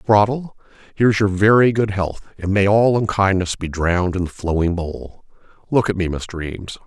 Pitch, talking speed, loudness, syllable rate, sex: 100 Hz, 190 wpm, -18 LUFS, 5.2 syllables/s, male